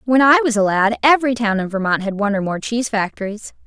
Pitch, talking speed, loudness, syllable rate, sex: 225 Hz, 245 wpm, -17 LUFS, 6.4 syllables/s, female